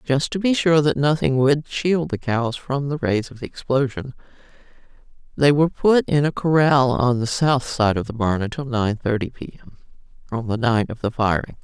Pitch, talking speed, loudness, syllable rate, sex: 130 Hz, 205 wpm, -20 LUFS, 5.0 syllables/s, female